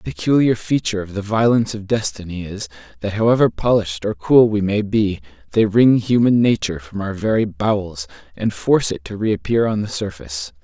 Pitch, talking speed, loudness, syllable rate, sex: 100 Hz, 185 wpm, -18 LUFS, 5.6 syllables/s, male